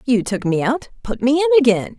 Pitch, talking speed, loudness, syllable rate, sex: 260 Hz, 210 wpm, -17 LUFS, 5.7 syllables/s, female